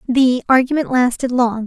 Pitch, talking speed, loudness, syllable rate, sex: 250 Hz, 145 wpm, -16 LUFS, 4.9 syllables/s, female